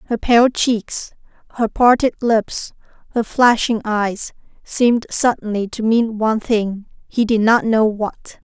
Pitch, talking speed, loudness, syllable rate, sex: 225 Hz, 135 wpm, -17 LUFS, 3.9 syllables/s, female